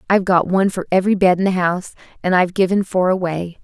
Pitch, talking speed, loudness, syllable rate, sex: 185 Hz, 230 wpm, -17 LUFS, 7.1 syllables/s, female